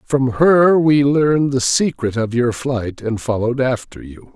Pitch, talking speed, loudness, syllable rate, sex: 130 Hz, 180 wpm, -16 LUFS, 4.3 syllables/s, male